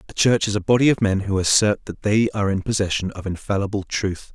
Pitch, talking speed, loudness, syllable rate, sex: 100 Hz, 235 wpm, -20 LUFS, 6.0 syllables/s, male